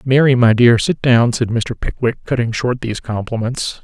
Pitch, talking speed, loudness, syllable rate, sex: 120 Hz, 190 wpm, -16 LUFS, 4.8 syllables/s, male